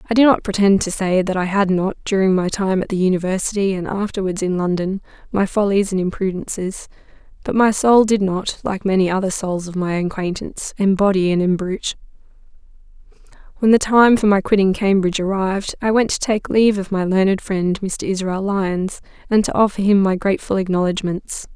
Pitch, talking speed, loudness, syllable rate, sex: 195 Hz, 185 wpm, -18 LUFS, 5.6 syllables/s, female